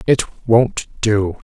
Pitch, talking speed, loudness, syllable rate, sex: 110 Hz, 120 wpm, -17 LUFS, 2.3 syllables/s, male